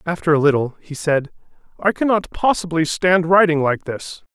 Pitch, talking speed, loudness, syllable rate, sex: 165 Hz, 180 wpm, -18 LUFS, 5.1 syllables/s, male